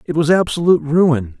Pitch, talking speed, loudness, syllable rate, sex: 155 Hz, 170 wpm, -15 LUFS, 5.5 syllables/s, male